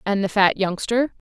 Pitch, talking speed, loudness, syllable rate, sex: 205 Hz, 180 wpm, -20 LUFS, 4.7 syllables/s, female